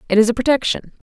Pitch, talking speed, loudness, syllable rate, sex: 240 Hz, 225 wpm, -18 LUFS, 7.7 syllables/s, female